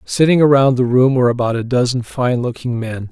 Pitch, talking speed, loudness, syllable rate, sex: 125 Hz, 210 wpm, -15 LUFS, 5.7 syllables/s, male